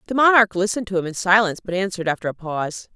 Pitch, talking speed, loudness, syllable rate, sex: 190 Hz, 245 wpm, -20 LUFS, 7.8 syllables/s, female